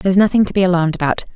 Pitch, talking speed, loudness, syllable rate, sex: 185 Hz, 265 wpm, -15 LUFS, 8.8 syllables/s, female